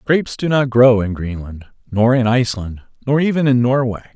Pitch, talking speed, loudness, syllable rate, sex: 120 Hz, 190 wpm, -16 LUFS, 5.6 syllables/s, male